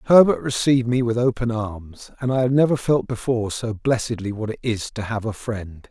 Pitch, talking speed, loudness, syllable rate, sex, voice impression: 115 Hz, 215 wpm, -21 LUFS, 5.4 syllables/s, male, masculine, middle-aged, thick, slightly tensed, slightly powerful, slightly hard, clear, slightly raspy, calm, mature, wild, lively, slightly strict